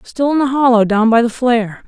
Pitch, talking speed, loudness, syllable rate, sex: 240 Hz, 255 wpm, -13 LUFS, 5.7 syllables/s, female